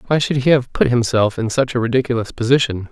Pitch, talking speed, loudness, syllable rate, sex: 125 Hz, 225 wpm, -17 LUFS, 6.2 syllables/s, male